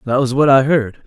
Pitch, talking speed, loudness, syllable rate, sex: 135 Hz, 280 wpm, -14 LUFS, 5.4 syllables/s, male